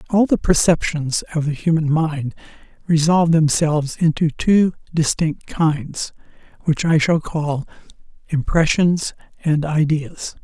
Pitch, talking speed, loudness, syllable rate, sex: 160 Hz, 115 wpm, -19 LUFS, 4.0 syllables/s, male